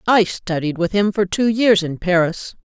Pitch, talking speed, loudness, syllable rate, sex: 190 Hz, 205 wpm, -18 LUFS, 4.5 syllables/s, female